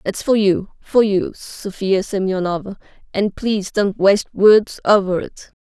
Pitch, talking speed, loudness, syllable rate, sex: 200 Hz, 150 wpm, -17 LUFS, 4.2 syllables/s, female